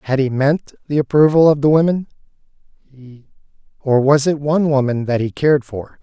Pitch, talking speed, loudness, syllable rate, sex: 140 Hz, 170 wpm, -16 LUFS, 5.7 syllables/s, male